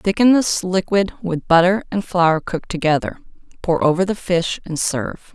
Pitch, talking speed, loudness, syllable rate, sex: 180 Hz, 170 wpm, -18 LUFS, 5.0 syllables/s, female